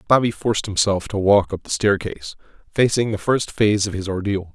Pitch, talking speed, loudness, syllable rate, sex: 100 Hz, 200 wpm, -20 LUFS, 5.8 syllables/s, male